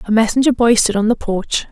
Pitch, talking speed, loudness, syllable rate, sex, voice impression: 225 Hz, 245 wpm, -15 LUFS, 5.8 syllables/s, female, very feminine, young, thin, slightly tensed, slightly powerful, slightly bright, hard, clear, fluent, slightly raspy, cute, slightly intellectual, refreshing, sincere, calm, very friendly, very reassuring, unique, elegant, slightly wild, sweet, lively, slightly kind